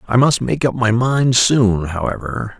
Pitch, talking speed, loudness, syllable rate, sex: 115 Hz, 185 wpm, -16 LUFS, 4.2 syllables/s, male